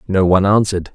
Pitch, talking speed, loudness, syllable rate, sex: 95 Hz, 190 wpm, -14 LUFS, 7.7 syllables/s, male